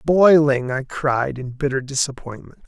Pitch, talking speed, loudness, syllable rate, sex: 140 Hz, 135 wpm, -19 LUFS, 4.3 syllables/s, male